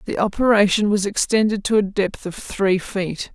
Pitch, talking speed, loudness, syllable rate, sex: 200 Hz, 180 wpm, -19 LUFS, 4.7 syllables/s, female